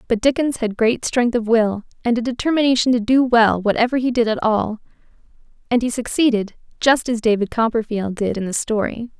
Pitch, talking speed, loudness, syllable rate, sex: 230 Hz, 190 wpm, -19 LUFS, 5.5 syllables/s, female